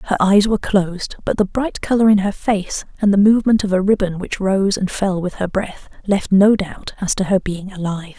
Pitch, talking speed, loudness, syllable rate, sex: 195 Hz, 235 wpm, -17 LUFS, 5.2 syllables/s, female